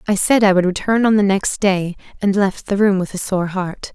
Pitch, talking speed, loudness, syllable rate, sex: 195 Hz, 260 wpm, -17 LUFS, 5.1 syllables/s, female